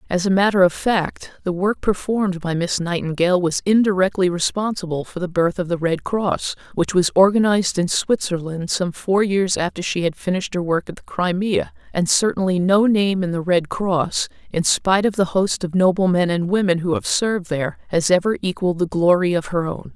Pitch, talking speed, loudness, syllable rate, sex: 185 Hz, 205 wpm, -19 LUFS, 5.3 syllables/s, female